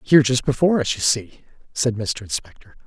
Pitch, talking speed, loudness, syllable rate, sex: 125 Hz, 190 wpm, -20 LUFS, 5.9 syllables/s, male